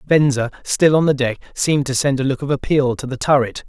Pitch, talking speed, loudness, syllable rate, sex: 135 Hz, 245 wpm, -18 LUFS, 5.8 syllables/s, male